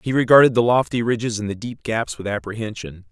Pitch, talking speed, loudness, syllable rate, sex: 115 Hz, 210 wpm, -19 LUFS, 6.0 syllables/s, male